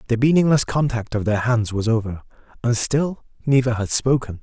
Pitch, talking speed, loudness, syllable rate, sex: 120 Hz, 175 wpm, -20 LUFS, 5.2 syllables/s, male